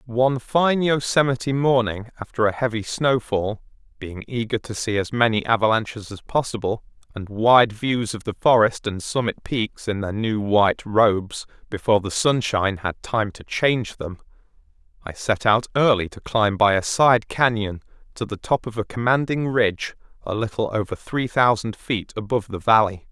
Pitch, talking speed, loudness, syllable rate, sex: 110 Hz, 170 wpm, -21 LUFS, 4.9 syllables/s, male